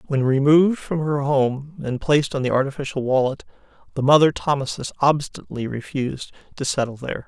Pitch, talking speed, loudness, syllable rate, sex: 140 Hz, 155 wpm, -21 LUFS, 6.0 syllables/s, male